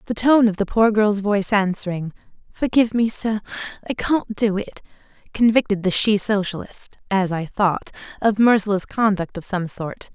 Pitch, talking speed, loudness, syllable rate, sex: 205 Hz, 155 wpm, -20 LUFS, 5.1 syllables/s, female